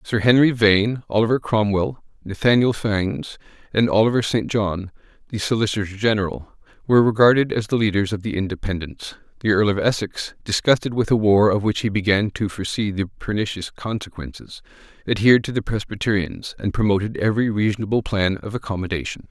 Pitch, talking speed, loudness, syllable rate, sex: 105 Hz, 155 wpm, -20 LUFS, 5.8 syllables/s, male